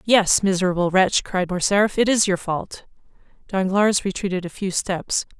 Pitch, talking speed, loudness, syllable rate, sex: 190 Hz, 155 wpm, -20 LUFS, 4.6 syllables/s, female